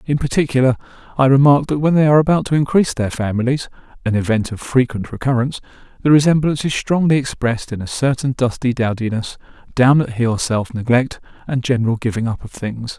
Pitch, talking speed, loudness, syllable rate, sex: 130 Hz, 180 wpm, -17 LUFS, 5.5 syllables/s, male